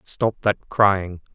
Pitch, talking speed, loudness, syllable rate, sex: 100 Hz, 135 wpm, -21 LUFS, 2.8 syllables/s, male